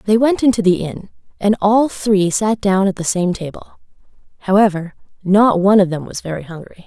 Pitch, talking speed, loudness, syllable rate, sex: 195 Hz, 190 wpm, -16 LUFS, 5.2 syllables/s, female